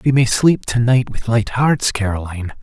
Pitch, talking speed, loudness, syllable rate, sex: 115 Hz, 205 wpm, -17 LUFS, 4.8 syllables/s, male